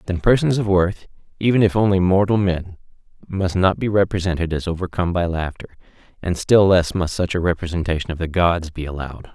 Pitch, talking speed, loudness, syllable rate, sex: 90 Hz, 185 wpm, -19 LUFS, 5.8 syllables/s, male